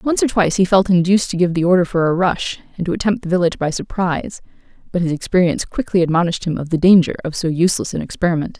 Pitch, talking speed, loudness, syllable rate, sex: 180 Hz, 235 wpm, -17 LUFS, 7.2 syllables/s, female